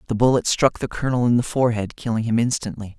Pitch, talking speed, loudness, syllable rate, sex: 115 Hz, 220 wpm, -21 LUFS, 6.8 syllables/s, male